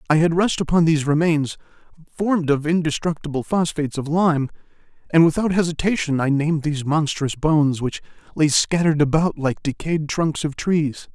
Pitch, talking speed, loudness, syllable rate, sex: 155 Hz, 155 wpm, -20 LUFS, 5.4 syllables/s, male